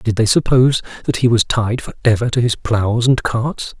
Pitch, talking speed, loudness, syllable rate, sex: 115 Hz, 220 wpm, -16 LUFS, 5.0 syllables/s, male